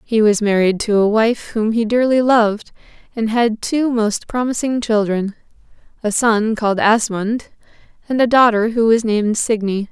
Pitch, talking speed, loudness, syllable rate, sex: 220 Hz, 155 wpm, -16 LUFS, 4.8 syllables/s, female